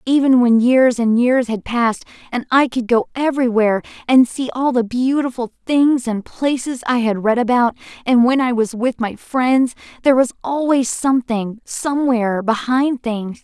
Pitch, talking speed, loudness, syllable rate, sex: 245 Hz, 170 wpm, -17 LUFS, 4.8 syllables/s, female